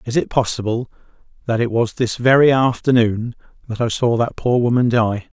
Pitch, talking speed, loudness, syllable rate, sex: 120 Hz, 180 wpm, -17 LUFS, 5.1 syllables/s, male